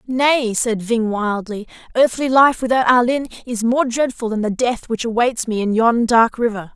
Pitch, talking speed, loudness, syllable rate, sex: 235 Hz, 185 wpm, -17 LUFS, 4.6 syllables/s, female